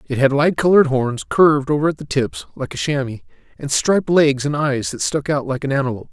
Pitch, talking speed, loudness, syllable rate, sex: 145 Hz, 235 wpm, -18 LUFS, 6.1 syllables/s, male